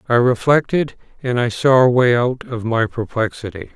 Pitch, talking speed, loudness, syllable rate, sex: 120 Hz, 175 wpm, -17 LUFS, 4.8 syllables/s, male